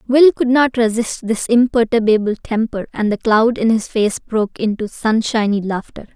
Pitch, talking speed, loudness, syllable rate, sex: 225 Hz, 165 wpm, -16 LUFS, 4.8 syllables/s, female